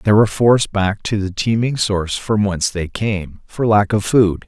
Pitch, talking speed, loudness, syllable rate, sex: 100 Hz, 215 wpm, -17 LUFS, 4.8 syllables/s, male